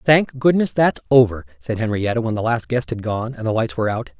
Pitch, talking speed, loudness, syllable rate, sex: 115 Hz, 245 wpm, -19 LUFS, 5.8 syllables/s, male